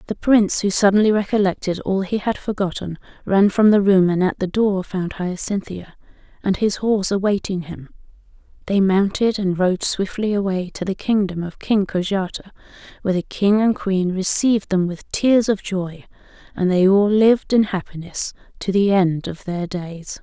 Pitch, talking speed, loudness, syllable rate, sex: 195 Hz, 175 wpm, -19 LUFS, 4.9 syllables/s, female